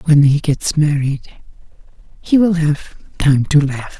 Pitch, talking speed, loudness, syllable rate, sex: 150 Hz, 150 wpm, -15 LUFS, 3.5 syllables/s, male